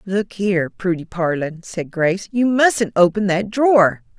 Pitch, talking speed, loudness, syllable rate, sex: 190 Hz, 160 wpm, -18 LUFS, 4.4 syllables/s, female